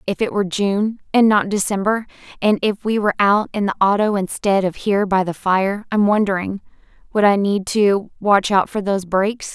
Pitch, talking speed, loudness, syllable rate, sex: 200 Hz, 195 wpm, -18 LUFS, 5.3 syllables/s, female